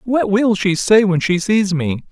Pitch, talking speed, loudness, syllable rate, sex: 195 Hz, 225 wpm, -15 LUFS, 4.1 syllables/s, male